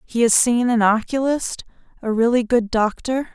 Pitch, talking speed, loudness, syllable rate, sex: 235 Hz, 145 wpm, -19 LUFS, 4.6 syllables/s, female